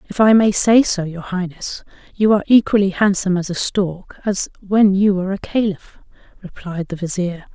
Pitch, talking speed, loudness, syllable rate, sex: 195 Hz, 185 wpm, -17 LUFS, 5.2 syllables/s, female